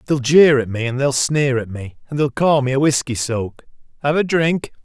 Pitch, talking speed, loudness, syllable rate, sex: 135 Hz, 235 wpm, -17 LUFS, 5.2 syllables/s, male